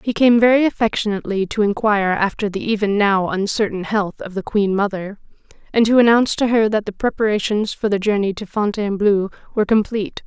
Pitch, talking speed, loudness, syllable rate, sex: 210 Hz, 180 wpm, -18 LUFS, 6.0 syllables/s, female